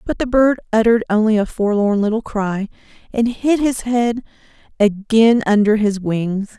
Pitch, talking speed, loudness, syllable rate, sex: 220 Hz, 155 wpm, -17 LUFS, 4.6 syllables/s, female